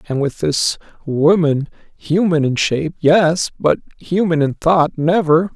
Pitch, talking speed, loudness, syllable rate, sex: 160 Hz, 110 wpm, -16 LUFS, 4.0 syllables/s, male